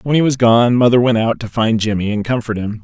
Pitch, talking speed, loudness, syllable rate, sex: 115 Hz, 275 wpm, -15 LUFS, 5.9 syllables/s, male